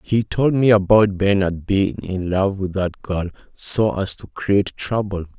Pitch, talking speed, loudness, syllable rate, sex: 100 Hz, 180 wpm, -19 LUFS, 4.1 syllables/s, male